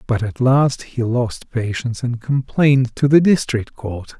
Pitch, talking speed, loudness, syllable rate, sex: 125 Hz, 170 wpm, -18 LUFS, 4.2 syllables/s, male